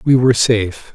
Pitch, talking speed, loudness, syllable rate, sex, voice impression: 115 Hz, 190 wpm, -14 LUFS, 5.9 syllables/s, male, very masculine, very adult-like, old, thick, slightly thin, tensed, slightly powerful, slightly bright, slightly dark, slightly hard, clear, slightly fluent, cool, very intellectual, slightly refreshing, sincere, calm, reassuring, slightly unique, elegant, slightly wild, very sweet, kind, strict, slightly modest